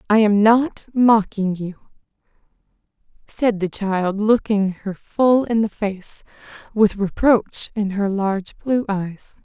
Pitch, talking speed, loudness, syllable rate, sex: 210 Hz, 135 wpm, -19 LUFS, 3.6 syllables/s, female